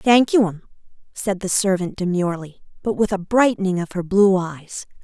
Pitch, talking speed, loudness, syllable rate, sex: 190 Hz, 180 wpm, -20 LUFS, 5.2 syllables/s, female